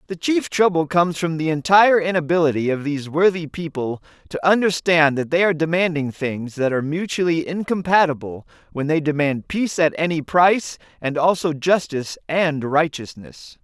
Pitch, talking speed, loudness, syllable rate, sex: 160 Hz, 155 wpm, -19 LUFS, 5.4 syllables/s, male